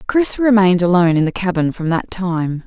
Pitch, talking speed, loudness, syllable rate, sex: 185 Hz, 200 wpm, -16 LUFS, 5.6 syllables/s, female